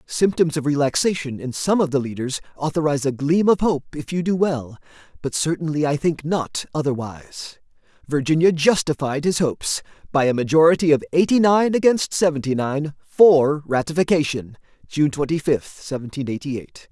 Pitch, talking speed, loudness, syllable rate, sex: 150 Hz, 155 wpm, -20 LUFS, 4.8 syllables/s, male